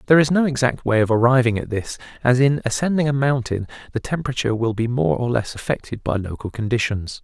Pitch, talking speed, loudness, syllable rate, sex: 125 Hz, 205 wpm, -20 LUFS, 6.3 syllables/s, male